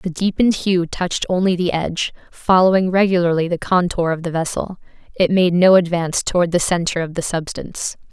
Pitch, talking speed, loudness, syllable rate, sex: 175 Hz, 175 wpm, -18 LUFS, 5.7 syllables/s, female